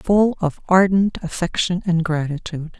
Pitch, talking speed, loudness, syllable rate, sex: 175 Hz, 130 wpm, -19 LUFS, 4.6 syllables/s, female